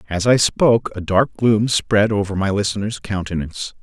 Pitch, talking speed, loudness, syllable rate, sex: 105 Hz, 175 wpm, -18 LUFS, 5.1 syllables/s, male